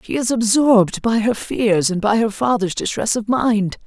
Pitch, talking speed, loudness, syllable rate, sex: 220 Hz, 200 wpm, -17 LUFS, 4.6 syllables/s, female